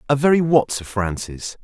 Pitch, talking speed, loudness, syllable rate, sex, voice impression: 125 Hz, 185 wpm, -19 LUFS, 4.9 syllables/s, male, masculine, adult-like, fluent, sincere, friendly, slightly lively